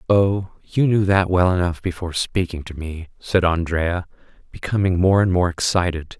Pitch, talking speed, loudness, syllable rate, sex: 90 Hz, 165 wpm, -20 LUFS, 4.8 syllables/s, male